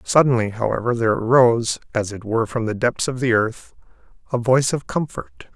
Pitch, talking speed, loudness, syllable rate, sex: 120 Hz, 185 wpm, -20 LUFS, 5.8 syllables/s, male